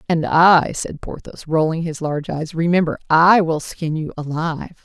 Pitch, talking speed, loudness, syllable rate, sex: 160 Hz, 175 wpm, -18 LUFS, 4.7 syllables/s, female